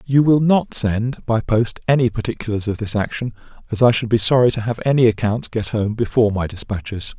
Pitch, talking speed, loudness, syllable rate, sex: 115 Hz, 210 wpm, -18 LUFS, 5.6 syllables/s, male